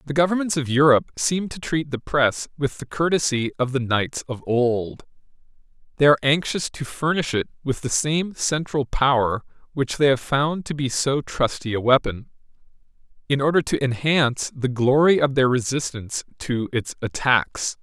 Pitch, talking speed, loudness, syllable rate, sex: 135 Hz, 170 wpm, -22 LUFS, 4.8 syllables/s, male